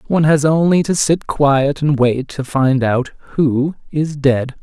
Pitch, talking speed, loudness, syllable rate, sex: 145 Hz, 180 wpm, -16 LUFS, 4.0 syllables/s, male